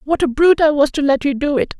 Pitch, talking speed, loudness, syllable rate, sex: 290 Hz, 335 wpm, -15 LUFS, 6.6 syllables/s, female